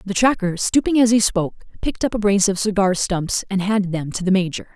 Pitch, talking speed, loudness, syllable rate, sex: 200 Hz, 240 wpm, -19 LUFS, 6.2 syllables/s, female